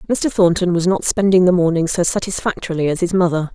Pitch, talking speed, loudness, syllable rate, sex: 180 Hz, 205 wpm, -16 LUFS, 6.2 syllables/s, female